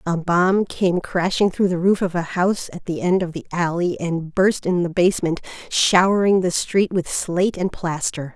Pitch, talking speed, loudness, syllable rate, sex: 175 Hz, 200 wpm, -20 LUFS, 4.7 syllables/s, female